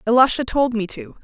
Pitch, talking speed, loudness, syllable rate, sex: 245 Hz, 195 wpm, -19 LUFS, 5.8 syllables/s, female